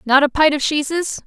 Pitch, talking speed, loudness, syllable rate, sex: 295 Hz, 235 wpm, -17 LUFS, 5.4 syllables/s, female